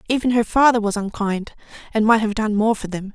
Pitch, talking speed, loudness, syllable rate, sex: 215 Hz, 230 wpm, -19 LUFS, 5.8 syllables/s, female